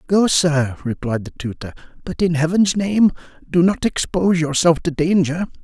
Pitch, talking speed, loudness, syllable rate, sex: 165 Hz, 160 wpm, -18 LUFS, 4.8 syllables/s, male